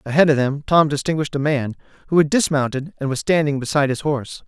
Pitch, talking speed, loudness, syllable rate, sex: 145 Hz, 215 wpm, -19 LUFS, 6.7 syllables/s, male